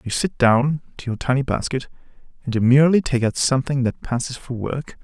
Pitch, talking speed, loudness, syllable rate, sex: 130 Hz, 190 wpm, -20 LUFS, 5.7 syllables/s, male